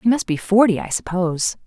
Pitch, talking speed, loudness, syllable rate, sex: 200 Hz, 215 wpm, -19 LUFS, 5.8 syllables/s, female